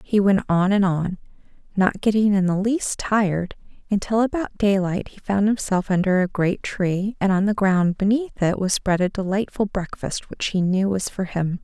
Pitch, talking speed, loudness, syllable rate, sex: 195 Hz, 195 wpm, -21 LUFS, 4.7 syllables/s, female